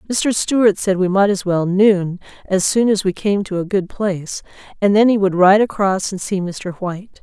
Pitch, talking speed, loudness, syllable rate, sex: 195 Hz, 225 wpm, -17 LUFS, 4.9 syllables/s, female